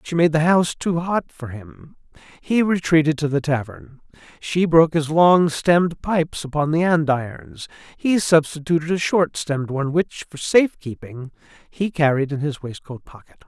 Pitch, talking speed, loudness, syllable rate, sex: 155 Hz, 160 wpm, -19 LUFS, 5.0 syllables/s, male